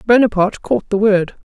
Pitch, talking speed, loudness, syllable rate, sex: 210 Hz, 155 wpm, -15 LUFS, 5.6 syllables/s, female